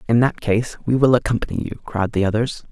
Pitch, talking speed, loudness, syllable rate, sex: 115 Hz, 220 wpm, -20 LUFS, 5.9 syllables/s, male